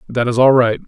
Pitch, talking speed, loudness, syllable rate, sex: 120 Hz, 275 wpm, -13 LUFS, 6.0 syllables/s, male